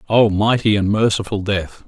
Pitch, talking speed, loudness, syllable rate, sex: 105 Hz, 160 wpm, -17 LUFS, 4.7 syllables/s, male